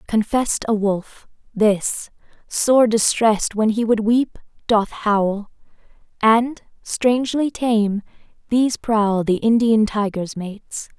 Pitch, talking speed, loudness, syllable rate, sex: 220 Hz, 115 wpm, -19 LUFS, 3.7 syllables/s, female